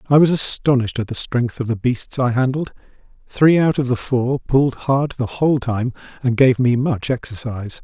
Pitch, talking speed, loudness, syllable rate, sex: 125 Hz, 200 wpm, -18 LUFS, 5.1 syllables/s, male